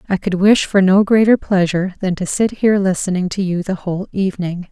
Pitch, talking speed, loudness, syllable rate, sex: 190 Hz, 215 wpm, -16 LUFS, 5.9 syllables/s, female